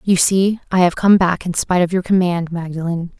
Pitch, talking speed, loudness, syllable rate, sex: 180 Hz, 225 wpm, -16 LUFS, 5.5 syllables/s, female